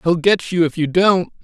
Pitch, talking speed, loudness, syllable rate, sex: 175 Hz, 250 wpm, -16 LUFS, 4.6 syllables/s, male